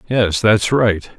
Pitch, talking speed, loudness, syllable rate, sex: 105 Hz, 150 wpm, -15 LUFS, 3.0 syllables/s, male